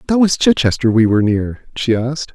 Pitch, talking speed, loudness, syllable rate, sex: 130 Hz, 205 wpm, -15 LUFS, 5.7 syllables/s, male